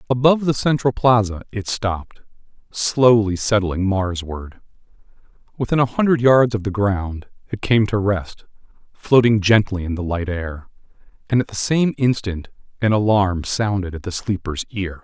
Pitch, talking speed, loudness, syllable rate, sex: 105 Hz, 150 wpm, -19 LUFS, 4.6 syllables/s, male